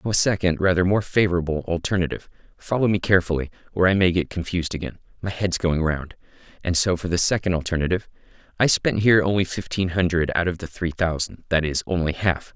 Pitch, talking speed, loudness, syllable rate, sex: 90 Hz, 185 wpm, -22 LUFS, 6.4 syllables/s, male